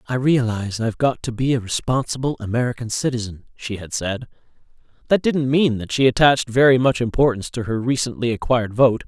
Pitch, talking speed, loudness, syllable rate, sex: 120 Hz, 180 wpm, -20 LUFS, 6.0 syllables/s, male